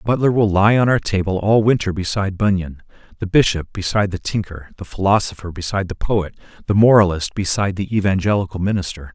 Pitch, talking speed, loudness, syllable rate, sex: 100 Hz, 170 wpm, -18 LUFS, 6.2 syllables/s, male